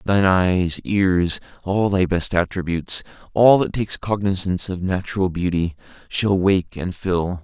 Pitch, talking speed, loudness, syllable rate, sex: 90 Hz, 130 wpm, -20 LUFS, 4.5 syllables/s, male